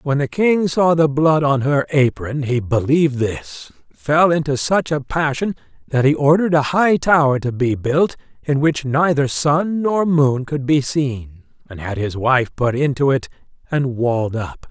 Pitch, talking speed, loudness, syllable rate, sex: 145 Hz, 185 wpm, -17 LUFS, 4.3 syllables/s, male